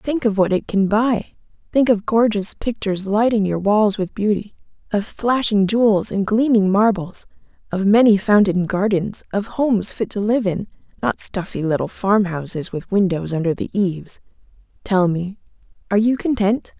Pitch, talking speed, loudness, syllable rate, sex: 205 Hz, 165 wpm, -19 LUFS, 4.9 syllables/s, female